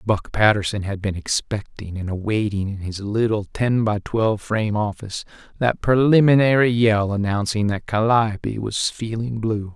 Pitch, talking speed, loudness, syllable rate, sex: 105 Hz, 150 wpm, -21 LUFS, 4.7 syllables/s, male